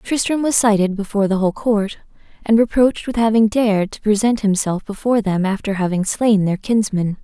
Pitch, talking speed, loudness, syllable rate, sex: 210 Hz, 180 wpm, -17 LUFS, 5.7 syllables/s, female